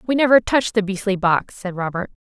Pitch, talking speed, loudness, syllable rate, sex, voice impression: 205 Hz, 210 wpm, -19 LUFS, 6.0 syllables/s, female, very feminine, adult-like, slightly muffled, fluent, slightly refreshing, slightly sincere, friendly